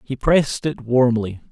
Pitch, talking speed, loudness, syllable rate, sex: 125 Hz, 160 wpm, -19 LUFS, 4.5 syllables/s, male